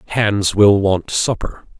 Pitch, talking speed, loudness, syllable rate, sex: 100 Hz, 135 wpm, -16 LUFS, 3.1 syllables/s, male